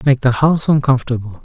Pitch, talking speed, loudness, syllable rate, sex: 130 Hz, 210 wpm, -15 LUFS, 7.6 syllables/s, male